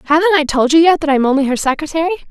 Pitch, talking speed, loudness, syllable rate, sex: 305 Hz, 260 wpm, -13 LUFS, 8.0 syllables/s, female